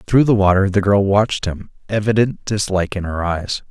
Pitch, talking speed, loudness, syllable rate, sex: 100 Hz, 195 wpm, -17 LUFS, 5.4 syllables/s, male